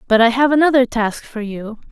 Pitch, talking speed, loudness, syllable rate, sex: 240 Hz, 220 wpm, -16 LUFS, 5.5 syllables/s, female